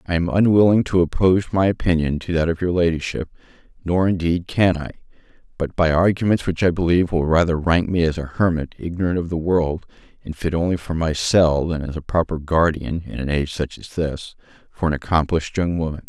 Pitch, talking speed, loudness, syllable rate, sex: 85 Hz, 205 wpm, -20 LUFS, 5.7 syllables/s, male